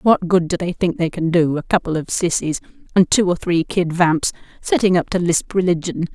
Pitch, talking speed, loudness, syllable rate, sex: 180 Hz, 225 wpm, -18 LUFS, 5.2 syllables/s, female